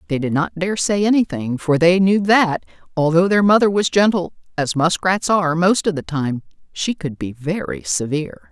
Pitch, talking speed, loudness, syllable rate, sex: 170 Hz, 190 wpm, -18 LUFS, 5.0 syllables/s, female